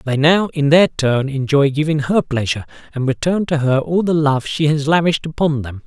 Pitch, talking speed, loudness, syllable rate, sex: 150 Hz, 215 wpm, -16 LUFS, 5.4 syllables/s, male